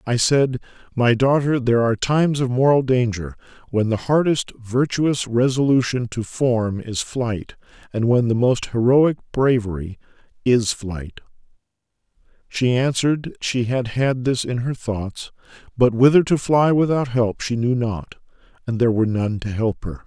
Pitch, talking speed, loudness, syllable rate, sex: 125 Hz, 155 wpm, -20 LUFS, 4.5 syllables/s, male